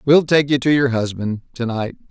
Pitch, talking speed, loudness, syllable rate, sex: 130 Hz, 170 wpm, -18 LUFS, 5.2 syllables/s, male